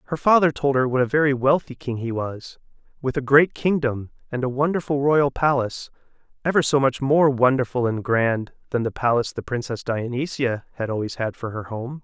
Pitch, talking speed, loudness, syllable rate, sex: 130 Hz, 195 wpm, -22 LUFS, 5.4 syllables/s, male